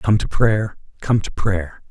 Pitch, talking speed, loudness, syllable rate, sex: 100 Hz, 190 wpm, -20 LUFS, 3.8 syllables/s, male